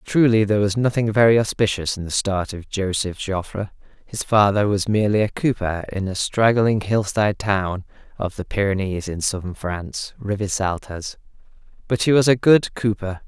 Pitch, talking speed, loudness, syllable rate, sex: 105 Hz, 160 wpm, -20 LUFS, 5.1 syllables/s, male